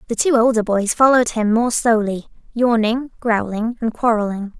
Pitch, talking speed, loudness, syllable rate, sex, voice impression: 225 Hz, 155 wpm, -17 LUFS, 5.0 syllables/s, female, slightly feminine, young, slightly tensed, slightly bright, cute, refreshing, slightly lively